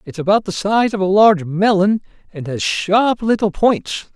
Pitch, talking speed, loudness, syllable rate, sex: 195 Hz, 190 wpm, -16 LUFS, 4.5 syllables/s, male